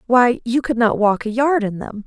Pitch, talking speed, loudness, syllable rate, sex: 235 Hz, 260 wpm, -18 LUFS, 4.8 syllables/s, female